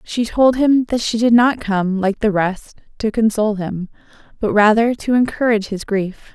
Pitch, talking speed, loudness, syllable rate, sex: 220 Hz, 190 wpm, -17 LUFS, 4.7 syllables/s, female